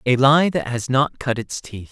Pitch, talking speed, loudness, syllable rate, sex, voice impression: 130 Hz, 250 wpm, -19 LUFS, 4.5 syllables/s, male, very masculine, adult-like, slightly middle-aged, very thick, tensed, powerful, slightly bright, soft, slightly muffled, fluent, cool, very intellectual, refreshing, very sincere, very calm, mature, friendly, reassuring, slightly unique, elegant, slightly wild, slightly sweet, lively, very kind, modest